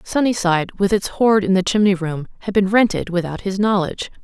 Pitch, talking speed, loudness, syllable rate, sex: 195 Hz, 200 wpm, -18 LUFS, 5.7 syllables/s, female